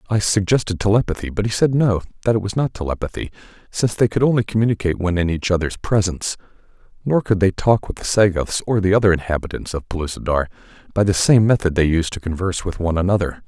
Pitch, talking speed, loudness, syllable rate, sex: 95 Hz, 205 wpm, -19 LUFS, 6.7 syllables/s, male